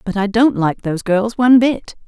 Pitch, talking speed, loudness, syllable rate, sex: 215 Hz, 230 wpm, -15 LUFS, 5.3 syllables/s, female